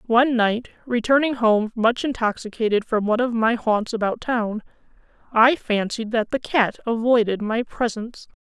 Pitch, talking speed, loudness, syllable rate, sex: 230 Hz, 150 wpm, -21 LUFS, 4.9 syllables/s, female